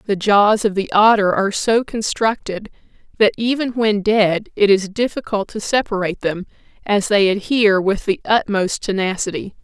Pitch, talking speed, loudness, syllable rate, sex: 205 Hz, 155 wpm, -17 LUFS, 4.9 syllables/s, female